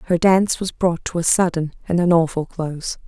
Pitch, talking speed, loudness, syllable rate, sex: 170 Hz, 215 wpm, -19 LUFS, 5.6 syllables/s, female